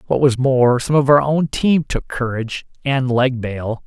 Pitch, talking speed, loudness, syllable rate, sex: 130 Hz, 200 wpm, -17 LUFS, 4.3 syllables/s, male